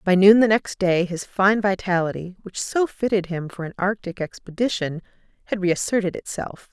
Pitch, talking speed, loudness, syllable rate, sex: 190 Hz, 180 wpm, -22 LUFS, 5.2 syllables/s, female